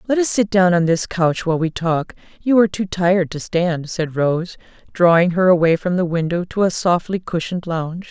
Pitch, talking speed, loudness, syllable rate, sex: 175 Hz, 215 wpm, -18 LUFS, 5.3 syllables/s, female